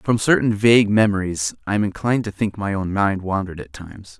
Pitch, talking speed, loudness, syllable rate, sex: 100 Hz, 215 wpm, -19 LUFS, 6.0 syllables/s, male